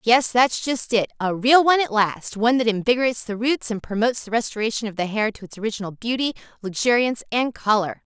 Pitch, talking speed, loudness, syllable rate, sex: 225 Hz, 185 wpm, -21 LUFS, 6.3 syllables/s, female